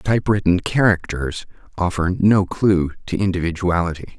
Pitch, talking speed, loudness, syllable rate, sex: 90 Hz, 115 wpm, -19 LUFS, 5.2 syllables/s, male